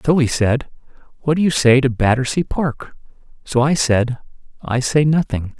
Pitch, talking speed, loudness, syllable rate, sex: 135 Hz, 170 wpm, -17 LUFS, 4.8 syllables/s, male